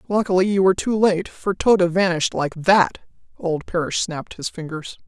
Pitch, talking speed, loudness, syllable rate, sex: 180 Hz, 175 wpm, -20 LUFS, 5.2 syllables/s, female